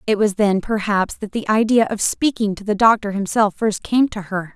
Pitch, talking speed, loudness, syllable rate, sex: 210 Hz, 225 wpm, -18 LUFS, 5.0 syllables/s, female